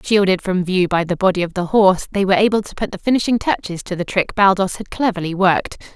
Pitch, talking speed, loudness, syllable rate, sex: 190 Hz, 240 wpm, -17 LUFS, 6.2 syllables/s, female